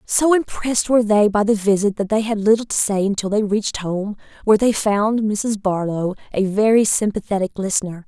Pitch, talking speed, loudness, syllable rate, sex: 210 Hz, 195 wpm, -18 LUFS, 5.5 syllables/s, female